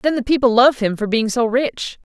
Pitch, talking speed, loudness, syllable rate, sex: 245 Hz, 250 wpm, -17 LUFS, 5.1 syllables/s, female